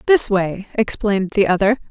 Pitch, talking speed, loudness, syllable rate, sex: 205 Hz, 160 wpm, -18 LUFS, 5.2 syllables/s, female